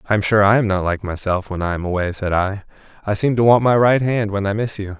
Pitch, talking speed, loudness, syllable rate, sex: 100 Hz, 300 wpm, -18 LUFS, 6.2 syllables/s, male